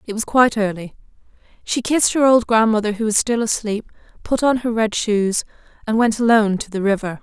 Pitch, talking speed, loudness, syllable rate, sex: 220 Hz, 200 wpm, -18 LUFS, 5.8 syllables/s, female